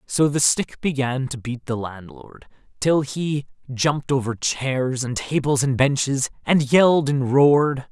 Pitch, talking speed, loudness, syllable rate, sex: 135 Hz, 160 wpm, -21 LUFS, 4.1 syllables/s, male